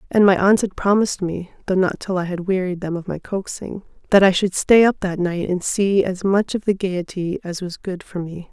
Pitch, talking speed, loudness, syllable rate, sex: 185 Hz, 230 wpm, -20 LUFS, 5.3 syllables/s, female